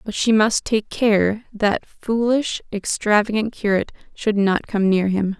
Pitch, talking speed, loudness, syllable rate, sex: 210 Hz, 155 wpm, -20 LUFS, 4.2 syllables/s, female